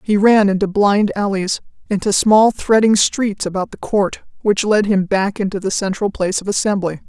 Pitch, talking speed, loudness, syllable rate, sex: 200 Hz, 185 wpm, -16 LUFS, 5.0 syllables/s, female